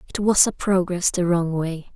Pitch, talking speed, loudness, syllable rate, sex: 180 Hz, 215 wpm, -21 LUFS, 4.5 syllables/s, female